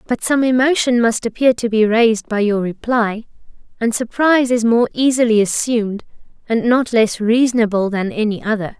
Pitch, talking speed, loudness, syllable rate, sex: 230 Hz, 165 wpm, -16 LUFS, 5.2 syllables/s, female